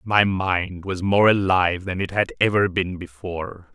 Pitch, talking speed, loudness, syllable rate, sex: 95 Hz, 175 wpm, -21 LUFS, 4.5 syllables/s, male